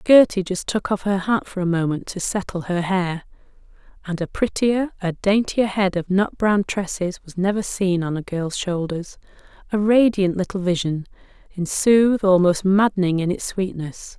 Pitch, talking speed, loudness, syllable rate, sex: 190 Hz, 165 wpm, -21 LUFS, 4.6 syllables/s, female